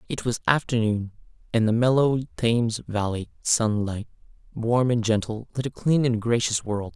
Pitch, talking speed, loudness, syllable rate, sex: 115 Hz, 155 wpm, -24 LUFS, 4.7 syllables/s, male